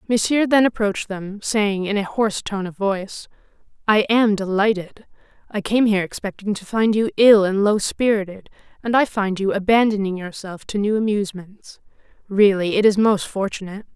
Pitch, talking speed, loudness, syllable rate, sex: 205 Hz, 170 wpm, -19 LUFS, 5.3 syllables/s, female